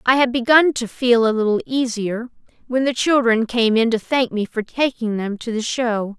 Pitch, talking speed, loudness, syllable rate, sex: 240 Hz, 215 wpm, -19 LUFS, 4.8 syllables/s, female